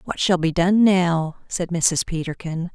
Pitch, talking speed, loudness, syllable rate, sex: 175 Hz, 175 wpm, -20 LUFS, 4.0 syllables/s, female